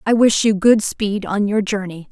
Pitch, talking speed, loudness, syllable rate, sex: 205 Hz, 225 wpm, -17 LUFS, 4.5 syllables/s, female